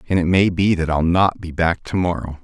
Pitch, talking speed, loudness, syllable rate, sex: 85 Hz, 270 wpm, -18 LUFS, 5.4 syllables/s, male